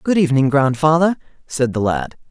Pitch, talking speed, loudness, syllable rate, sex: 145 Hz, 155 wpm, -17 LUFS, 5.6 syllables/s, male